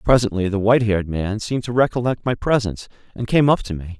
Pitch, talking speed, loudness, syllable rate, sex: 110 Hz, 225 wpm, -19 LUFS, 6.6 syllables/s, male